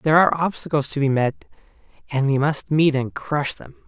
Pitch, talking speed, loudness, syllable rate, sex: 145 Hz, 200 wpm, -21 LUFS, 5.5 syllables/s, male